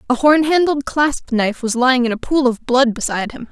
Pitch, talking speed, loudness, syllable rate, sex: 260 Hz, 240 wpm, -16 LUFS, 5.7 syllables/s, female